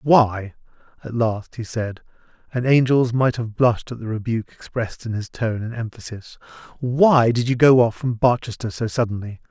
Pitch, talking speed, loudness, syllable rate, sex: 115 Hz, 165 wpm, -20 LUFS, 5.1 syllables/s, male